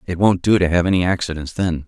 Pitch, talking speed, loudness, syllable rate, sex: 90 Hz, 255 wpm, -18 LUFS, 6.3 syllables/s, male